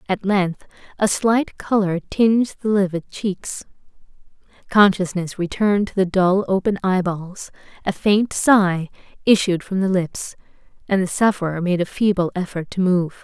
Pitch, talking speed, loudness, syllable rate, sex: 190 Hz, 145 wpm, -20 LUFS, 4.4 syllables/s, female